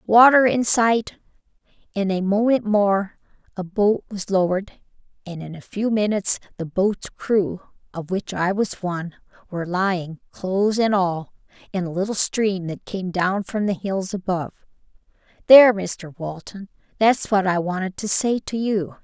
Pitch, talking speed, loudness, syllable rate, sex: 195 Hz, 160 wpm, -21 LUFS, 4.6 syllables/s, female